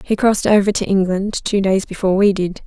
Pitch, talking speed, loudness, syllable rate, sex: 195 Hz, 225 wpm, -16 LUFS, 5.8 syllables/s, female